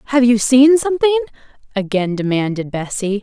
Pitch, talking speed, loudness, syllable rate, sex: 235 Hz, 130 wpm, -16 LUFS, 5.6 syllables/s, female